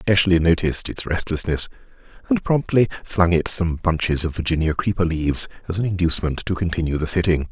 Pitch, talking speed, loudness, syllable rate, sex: 85 Hz, 170 wpm, -21 LUFS, 5.9 syllables/s, male